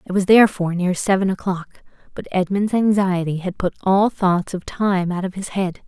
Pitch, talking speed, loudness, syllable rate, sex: 190 Hz, 195 wpm, -19 LUFS, 5.3 syllables/s, female